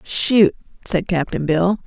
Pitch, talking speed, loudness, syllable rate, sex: 185 Hz, 130 wpm, -18 LUFS, 2.9 syllables/s, female